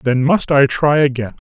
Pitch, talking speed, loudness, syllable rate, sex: 140 Hz, 205 wpm, -14 LUFS, 4.4 syllables/s, male